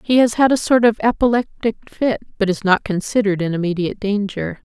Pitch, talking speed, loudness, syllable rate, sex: 210 Hz, 190 wpm, -18 LUFS, 5.7 syllables/s, female